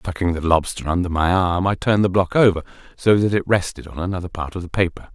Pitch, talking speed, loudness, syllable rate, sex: 90 Hz, 245 wpm, -20 LUFS, 6.3 syllables/s, male